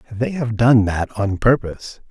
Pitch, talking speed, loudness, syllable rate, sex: 110 Hz, 170 wpm, -18 LUFS, 4.4 syllables/s, male